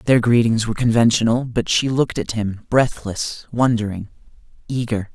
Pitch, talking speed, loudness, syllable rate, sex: 115 Hz, 140 wpm, -19 LUFS, 5.0 syllables/s, male